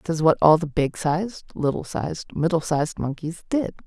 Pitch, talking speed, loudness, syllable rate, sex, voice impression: 160 Hz, 200 wpm, -23 LUFS, 5.4 syllables/s, female, feminine, adult-like, powerful, clear, fluent, intellectual, elegant, lively, slightly intense